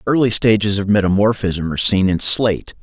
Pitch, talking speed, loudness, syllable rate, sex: 100 Hz, 170 wpm, -16 LUFS, 5.7 syllables/s, male